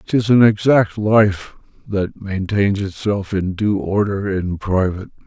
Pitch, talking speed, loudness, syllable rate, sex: 100 Hz, 135 wpm, -18 LUFS, 3.8 syllables/s, male